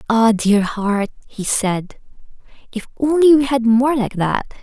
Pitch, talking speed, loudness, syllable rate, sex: 235 Hz, 155 wpm, -17 LUFS, 3.9 syllables/s, female